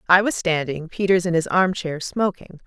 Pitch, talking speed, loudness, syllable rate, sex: 175 Hz, 205 wpm, -21 LUFS, 4.9 syllables/s, female